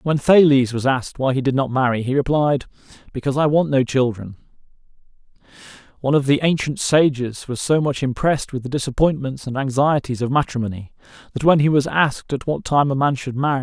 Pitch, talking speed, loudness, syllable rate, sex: 135 Hz, 195 wpm, -19 LUFS, 6.0 syllables/s, male